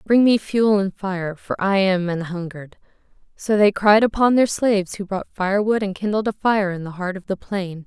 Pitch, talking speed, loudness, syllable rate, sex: 195 Hz, 220 wpm, -20 LUFS, 5.0 syllables/s, female